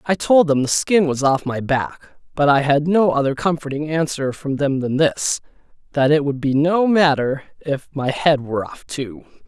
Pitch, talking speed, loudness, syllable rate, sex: 145 Hz, 205 wpm, -19 LUFS, 4.7 syllables/s, male